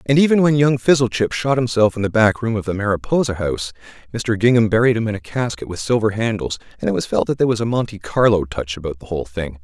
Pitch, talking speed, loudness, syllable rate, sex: 110 Hz, 250 wpm, -18 LUFS, 6.5 syllables/s, male